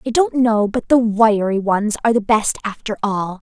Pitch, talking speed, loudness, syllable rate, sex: 220 Hz, 205 wpm, -17 LUFS, 4.8 syllables/s, female